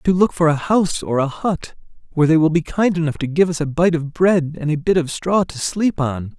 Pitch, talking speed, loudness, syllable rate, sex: 165 Hz, 275 wpm, -18 LUFS, 5.5 syllables/s, male